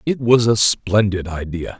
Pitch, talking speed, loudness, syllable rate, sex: 105 Hz, 165 wpm, -17 LUFS, 4.2 syllables/s, male